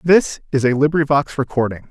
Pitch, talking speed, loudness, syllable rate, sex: 140 Hz, 155 wpm, -17 LUFS, 5.5 syllables/s, male